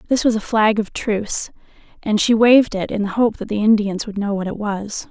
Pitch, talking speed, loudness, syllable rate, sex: 210 Hz, 245 wpm, -18 LUFS, 5.5 syllables/s, female